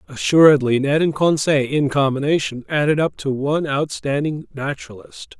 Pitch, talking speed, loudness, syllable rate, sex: 145 Hz, 135 wpm, -18 LUFS, 5.1 syllables/s, male